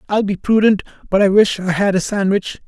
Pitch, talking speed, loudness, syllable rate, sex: 200 Hz, 225 wpm, -16 LUFS, 5.6 syllables/s, male